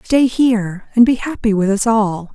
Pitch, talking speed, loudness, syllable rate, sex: 220 Hz, 205 wpm, -15 LUFS, 4.6 syllables/s, female